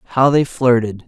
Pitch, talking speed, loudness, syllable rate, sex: 125 Hz, 170 wpm, -15 LUFS, 5.3 syllables/s, male